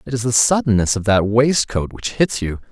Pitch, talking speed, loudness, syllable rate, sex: 115 Hz, 220 wpm, -17 LUFS, 5.2 syllables/s, male